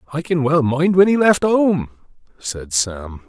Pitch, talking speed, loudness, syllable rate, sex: 150 Hz, 185 wpm, -17 LUFS, 3.8 syllables/s, male